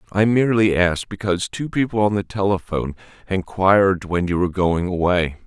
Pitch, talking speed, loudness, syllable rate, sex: 95 Hz, 165 wpm, -19 LUFS, 5.8 syllables/s, male